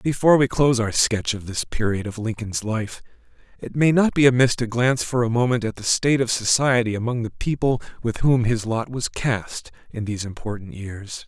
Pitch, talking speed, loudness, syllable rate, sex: 120 Hz, 210 wpm, -21 LUFS, 5.4 syllables/s, male